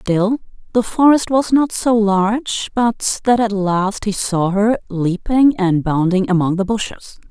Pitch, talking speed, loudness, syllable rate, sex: 210 Hz, 165 wpm, -16 LUFS, 3.9 syllables/s, female